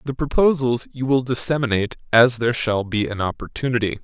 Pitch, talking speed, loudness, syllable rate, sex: 120 Hz, 165 wpm, -20 LUFS, 5.9 syllables/s, male